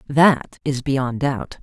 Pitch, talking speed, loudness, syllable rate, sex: 135 Hz, 150 wpm, -20 LUFS, 2.9 syllables/s, female